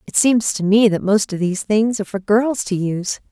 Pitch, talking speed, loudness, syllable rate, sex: 210 Hz, 255 wpm, -18 LUFS, 5.5 syllables/s, female